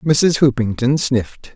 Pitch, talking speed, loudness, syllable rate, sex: 130 Hz, 115 wpm, -16 LUFS, 4.0 syllables/s, male